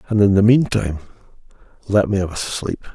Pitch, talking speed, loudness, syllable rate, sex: 100 Hz, 185 wpm, -18 LUFS, 6.2 syllables/s, male